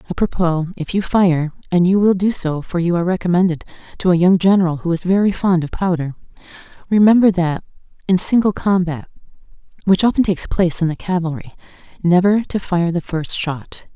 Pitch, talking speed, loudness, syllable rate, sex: 180 Hz, 170 wpm, -17 LUFS, 5.7 syllables/s, female